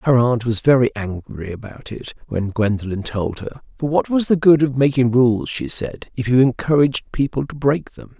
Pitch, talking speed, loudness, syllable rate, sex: 125 Hz, 205 wpm, -19 LUFS, 4.9 syllables/s, male